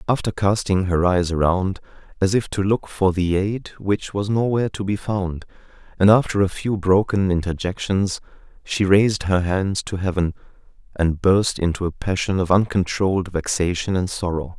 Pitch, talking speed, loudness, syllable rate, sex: 95 Hz, 165 wpm, -21 LUFS, 4.8 syllables/s, male